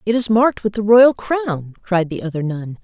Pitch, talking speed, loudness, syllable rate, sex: 195 Hz, 235 wpm, -17 LUFS, 4.9 syllables/s, female